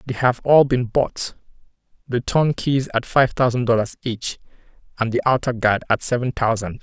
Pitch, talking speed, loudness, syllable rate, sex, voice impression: 120 Hz, 160 wpm, -20 LUFS, 4.8 syllables/s, male, masculine, adult-like, slightly muffled, slightly halting, slightly sincere, slightly calm, slightly wild